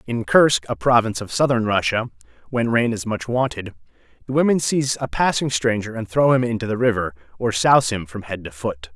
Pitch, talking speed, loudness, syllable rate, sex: 115 Hz, 210 wpm, -20 LUFS, 5.7 syllables/s, male